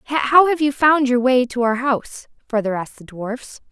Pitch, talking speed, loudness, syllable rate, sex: 255 Hz, 210 wpm, -18 LUFS, 5.0 syllables/s, female